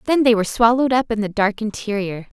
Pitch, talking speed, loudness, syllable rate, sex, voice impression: 220 Hz, 225 wpm, -19 LUFS, 6.5 syllables/s, female, feminine, adult-like, tensed, powerful, bright, clear, fluent, nasal, intellectual, calm, friendly, reassuring, slightly sweet, lively